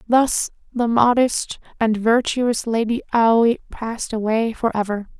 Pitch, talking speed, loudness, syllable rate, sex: 230 Hz, 115 wpm, -19 LUFS, 4.2 syllables/s, female